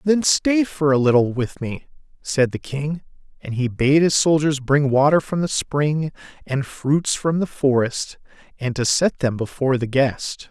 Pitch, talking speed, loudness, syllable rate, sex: 145 Hz, 185 wpm, -20 LUFS, 4.2 syllables/s, male